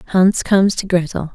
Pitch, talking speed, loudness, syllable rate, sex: 185 Hz, 180 wpm, -16 LUFS, 4.6 syllables/s, female